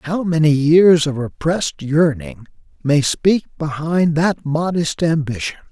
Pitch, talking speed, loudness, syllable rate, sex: 155 Hz, 125 wpm, -17 LUFS, 3.8 syllables/s, male